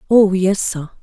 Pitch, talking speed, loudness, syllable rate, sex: 190 Hz, 175 wpm, -16 LUFS, 4.0 syllables/s, female